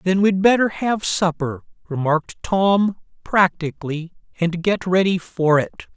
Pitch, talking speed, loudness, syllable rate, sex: 180 Hz, 130 wpm, -20 LUFS, 4.4 syllables/s, male